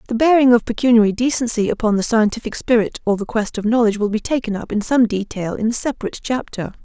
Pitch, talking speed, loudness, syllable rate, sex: 225 Hz, 220 wpm, -18 LUFS, 6.6 syllables/s, female